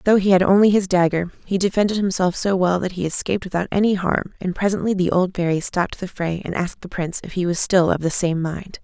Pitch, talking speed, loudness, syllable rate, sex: 185 Hz, 250 wpm, -20 LUFS, 6.2 syllables/s, female